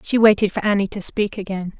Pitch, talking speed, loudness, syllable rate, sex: 200 Hz, 235 wpm, -19 LUFS, 6.0 syllables/s, female